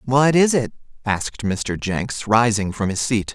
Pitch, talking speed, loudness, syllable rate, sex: 115 Hz, 180 wpm, -20 LUFS, 4.1 syllables/s, male